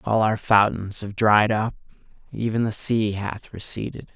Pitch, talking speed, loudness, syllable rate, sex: 105 Hz, 160 wpm, -23 LUFS, 4.3 syllables/s, male